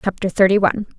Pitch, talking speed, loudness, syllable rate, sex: 195 Hz, 180 wpm, -17 LUFS, 7.5 syllables/s, female